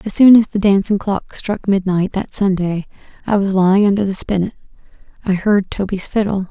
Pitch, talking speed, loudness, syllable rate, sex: 195 Hz, 165 wpm, -16 LUFS, 5.3 syllables/s, female